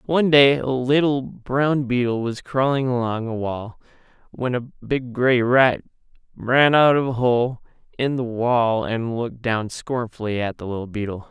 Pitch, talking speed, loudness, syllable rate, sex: 125 Hz, 170 wpm, -21 LUFS, 4.3 syllables/s, male